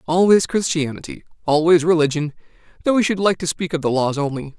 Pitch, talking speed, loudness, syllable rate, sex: 165 Hz, 185 wpm, -19 LUFS, 5.9 syllables/s, male